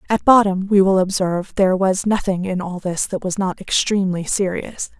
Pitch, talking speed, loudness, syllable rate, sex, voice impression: 190 Hz, 190 wpm, -18 LUFS, 5.3 syllables/s, female, feminine, adult-like, tensed, powerful, slightly hard, slightly muffled, raspy, intellectual, calm, elegant, slightly lively, slightly sharp